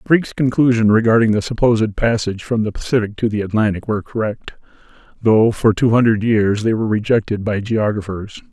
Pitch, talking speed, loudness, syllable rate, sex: 110 Hz, 170 wpm, -17 LUFS, 5.8 syllables/s, male